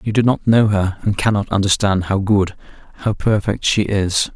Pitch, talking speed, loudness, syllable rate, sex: 100 Hz, 195 wpm, -17 LUFS, 4.8 syllables/s, male